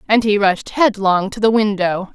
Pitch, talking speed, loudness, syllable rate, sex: 205 Hz, 195 wpm, -16 LUFS, 4.6 syllables/s, female